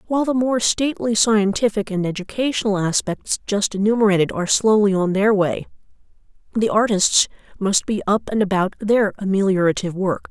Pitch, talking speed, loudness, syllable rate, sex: 205 Hz, 145 wpm, -19 LUFS, 5.6 syllables/s, female